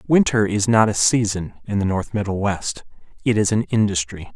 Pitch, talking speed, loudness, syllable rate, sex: 105 Hz, 180 wpm, -20 LUFS, 5.2 syllables/s, male